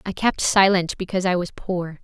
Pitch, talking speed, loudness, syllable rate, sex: 185 Hz, 205 wpm, -21 LUFS, 5.3 syllables/s, female